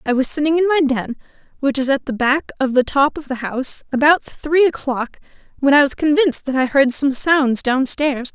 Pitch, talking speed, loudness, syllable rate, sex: 280 Hz, 215 wpm, -17 LUFS, 5.2 syllables/s, female